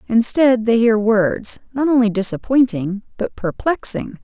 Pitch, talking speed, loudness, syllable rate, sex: 225 Hz, 130 wpm, -17 LUFS, 4.3 syllables/s, female